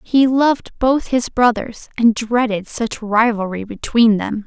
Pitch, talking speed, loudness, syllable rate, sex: 230 Hz, 150 wpm, -17 LUFS, 4.0 syllables/s, female